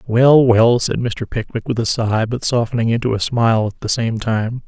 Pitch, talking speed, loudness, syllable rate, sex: 115 Hz, 220 wpm, -17 LUFS, 5.0 syllables/s, male